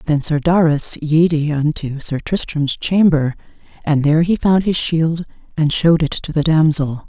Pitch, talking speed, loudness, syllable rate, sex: 155 Hz, 170 wpm, -16 LUFS, 4.8 syllables/s, female